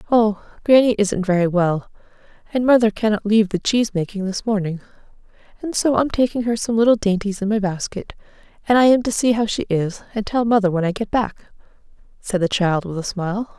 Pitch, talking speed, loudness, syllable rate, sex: 210 Hz, 205 wpm, -19 LUFS, 5.9 syllables/s, female